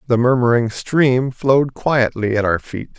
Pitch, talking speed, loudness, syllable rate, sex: 120 Hz, 160 wpm, -17 LUFS, 4.3 syllables/s, male